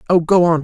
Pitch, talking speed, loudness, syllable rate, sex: 170 Hz, 285 wpm, -14 LUFS, 6.3 syllables/s, male